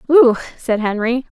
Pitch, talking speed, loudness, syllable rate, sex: 245 Hz, 130 wpm, -16 LUFS, 4.4 syllables/s, female